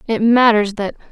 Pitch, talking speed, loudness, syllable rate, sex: 220 Hz, 160 wpm, -14 LUFS, 5.2 syllables/s, female